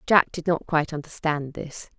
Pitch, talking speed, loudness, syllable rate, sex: 160 Hz, 180 wpm, -25 LUFS, 5.0 syllables/s, female